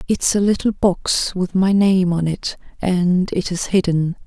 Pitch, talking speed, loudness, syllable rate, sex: 185 Hz, 185 wpm, -18 LUFS, 4.0 syllables/s, female